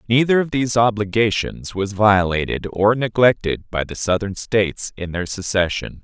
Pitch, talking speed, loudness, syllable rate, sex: 105 Hz, 150 wpm, -19 LUFS, 4.8 syllables/s, male